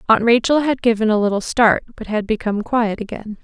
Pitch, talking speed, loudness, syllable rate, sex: 225 Hz, 210 wpm, -18 LUFS, 5.8 syllables/s, female